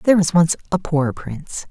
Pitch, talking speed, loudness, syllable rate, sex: 170 Hz, 210 wpm, -19 LUFS, 5.6 syllables/s, female